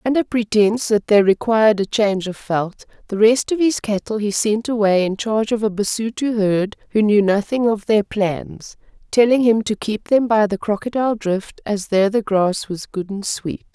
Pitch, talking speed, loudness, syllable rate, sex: 210 Hz, 200 wpm, -18 LUFS, 4.9 syllables/s, female